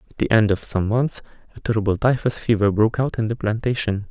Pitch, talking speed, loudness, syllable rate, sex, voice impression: 110 Hz, 220 wpm, -21 LUFS, 6.2 syllables/s, male, very masculine, slightly middle-aged, thick, relaxed, weak, very dark, very soft, very muffled, fluent, slightly raspy, cool, intellectual, slightly refreshing, very sincere, very calm, mature, friendly, reassuring, very unique, very elegant, slightly wild, sweet, slightly lively, very kind, very modest